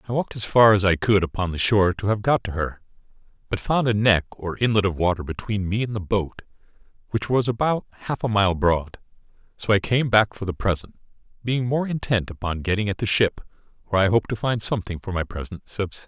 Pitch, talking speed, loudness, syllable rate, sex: 105 Hz, 225 wpm, -22 LUFS, 6.1 syllables/s, male